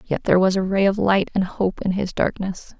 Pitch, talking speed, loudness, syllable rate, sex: 190 Hz, 260 wpm, -21 LUFS, 5.4 syllables/s, female